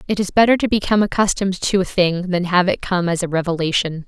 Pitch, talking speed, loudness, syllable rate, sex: 185 Hz, 235 wpm, -18 LUFS, 6.4 syllables/s, female